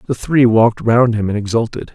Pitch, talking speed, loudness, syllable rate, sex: 115 Hz, 215 wpm, -14 LUFS, 5.7 syllables/s, male